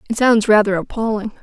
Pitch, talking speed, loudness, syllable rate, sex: 215 Hz, 170 wpm, -16 LUFS, 6.0 syllables/s, female